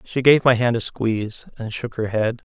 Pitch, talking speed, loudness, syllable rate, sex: 115 Hz, 240 wpm, -20 LUFS, 4.9 syllables/s, male